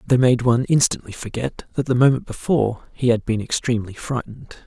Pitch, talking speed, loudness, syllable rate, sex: 120 Hz, 180 wpm, -20 LUFS, 6.0 syllables/s, male